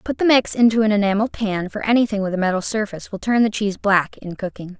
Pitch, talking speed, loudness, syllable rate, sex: 205 Hz, 250 wpm, -19 LUFS, 6.6 syllables/s, female